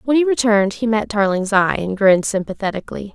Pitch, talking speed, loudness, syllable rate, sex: 210 Hz, 190 wpm, -17 LUFS, 6.2 syllables/s, female